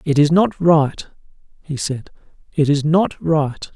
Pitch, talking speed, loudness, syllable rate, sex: 155 Hz, 160 wpm, -17 LUFS, 3.7 syllables/s, male